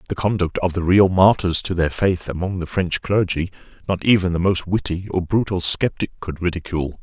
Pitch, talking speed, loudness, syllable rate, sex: 90 Hz, 195 wpm, -20 LUFS, 5.4 syllables/s, male